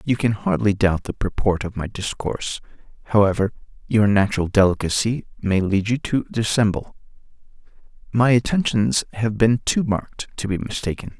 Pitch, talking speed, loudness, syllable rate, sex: 105 Hz, 145 wpm, -21 LUFS, 5.2 syllables/s, male